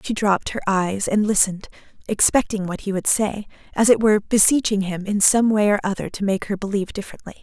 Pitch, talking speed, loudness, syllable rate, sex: 205 Hz, 210 wpm, -20 LUFS, 6.2 syllables/s, female